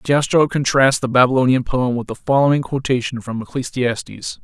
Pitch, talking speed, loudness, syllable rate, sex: 130 Hz, 150 wpm, -18 LUFS, 5.3 syllables/s, male